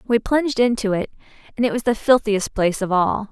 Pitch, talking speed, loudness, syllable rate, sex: 220 Hz, 215 wpm, -19 LUFS, 6.0 syllables/s, female